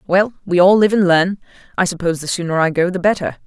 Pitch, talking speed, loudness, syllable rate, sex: 180 Hz, 240 wpm, -16 LUFS, 6.5 syllables/s, female